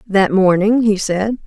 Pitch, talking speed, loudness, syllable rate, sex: 200 Hz, 165 wpm, -15 LUFS, 3.9 syllables/s, female